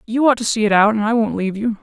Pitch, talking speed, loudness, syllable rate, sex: 220 Hz, 360 wpm, -17 LUFS, 7.3 syllables/s, female